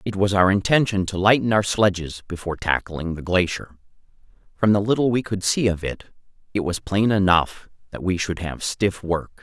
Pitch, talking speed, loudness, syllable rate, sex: 95 Hz, 190 wpm, -21 LUFS, 5.1 syllables/s, male